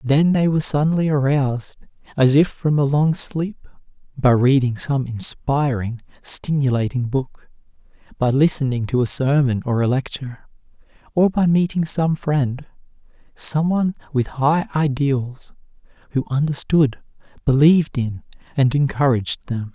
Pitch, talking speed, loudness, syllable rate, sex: 140 Hz, 120 wpm, -19 LUFS, 4.5 syllables/s, male